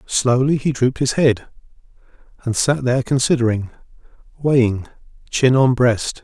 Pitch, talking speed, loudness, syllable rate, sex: 125 Hz, 125 wpm, -18 LUFS, 4.9 syllables/s, male